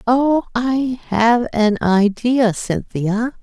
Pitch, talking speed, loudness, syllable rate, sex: 230 Hz, 105 wpm, -17 LUFS, 2.7 syllables/s, female